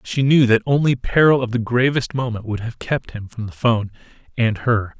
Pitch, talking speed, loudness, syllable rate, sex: 120 Hz, 205 wpm, -19 LUFS, 5.2 syllables/s, male